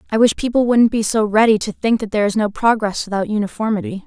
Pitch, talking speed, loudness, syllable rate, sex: 215 Hz, 235 wpm, -17 LUFS, 6.5 syllables/s, female